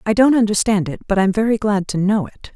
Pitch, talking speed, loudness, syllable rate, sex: 205 Hz, 260 wpm, -17 LUFS, 6.0 syllables/s, female